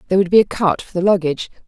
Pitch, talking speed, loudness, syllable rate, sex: 185 Hz, 285 wpm, -17 LUFS, 8.3 syllables/s, female